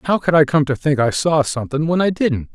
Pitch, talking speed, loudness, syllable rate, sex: 150 Hz, 285 wpm, -17 LUFS, 5.9 syllables/s, male